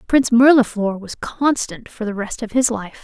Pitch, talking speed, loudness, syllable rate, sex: 230 Hz, 200 wpm, -18 LUFS, 4.9 syllables/s, female